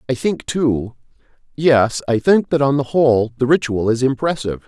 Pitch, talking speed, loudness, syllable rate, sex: 130 Hz, 165 wpm, -17 LUFS, 5.1 syllables/s, male